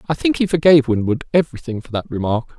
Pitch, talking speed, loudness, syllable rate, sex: 135 Hz, 210 wpm, -18 LUFS, 7.0 syllables/s, male